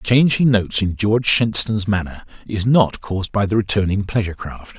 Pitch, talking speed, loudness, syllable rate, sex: 100 Hz, 200 wpm, -18 LUFS, 6.0 syllables/s, male